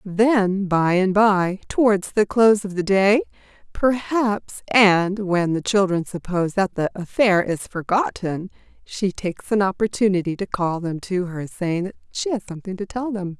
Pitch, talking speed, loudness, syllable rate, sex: 195 Hz, 170 wpm, -21 LUFS, 4.5 syllables/s, female